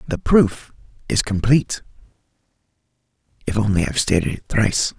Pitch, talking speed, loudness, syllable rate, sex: 110 Hz, 120 wpm, -19 LUFS, 5.7 syllables/s, male